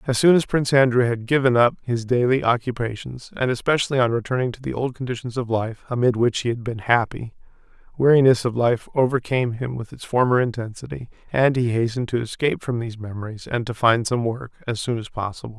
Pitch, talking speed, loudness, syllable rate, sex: 120 Hz, 205 wpm, -21 LUFS, 6.1 syllables/s, male